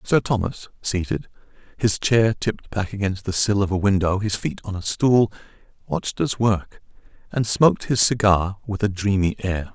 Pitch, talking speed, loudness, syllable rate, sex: 105 Hz, 180 wpm, -22 LUFS, 4.8 syllables/s, male